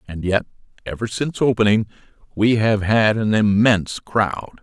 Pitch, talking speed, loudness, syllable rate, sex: 105 Hz, 145 wpm, -19 LUFS, 4.7 syllables/s, male